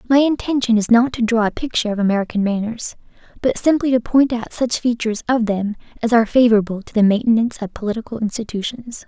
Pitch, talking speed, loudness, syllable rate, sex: 230 Hz, 190 wpm, -18 LUFS, 6.5 syllables/s, female